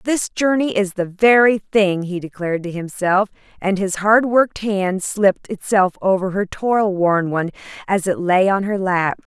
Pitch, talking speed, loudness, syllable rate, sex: 195 Hz, 180 wpm, -18 LUFS, 4.6 syllables/s, female